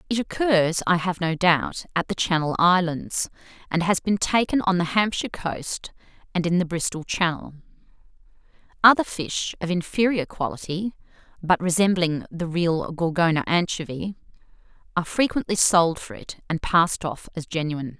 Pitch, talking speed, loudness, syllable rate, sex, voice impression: 175 Hz, 145 wpm, -23 LUFS, 4.9 syllables/s, female, feminine, very adult-like, slightly clear, fluent, slightly intellectual, slightly unique